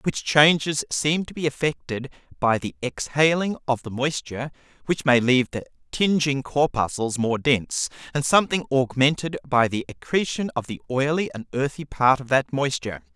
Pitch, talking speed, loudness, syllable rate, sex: 135 Hz, 160 wpm, -23 LUFS, 5.0 syllables/s, male